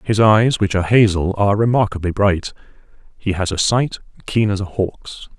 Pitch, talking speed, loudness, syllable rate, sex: 100 Hz, 180 wpm, -17 LUFS, 5.1 syllables/s, male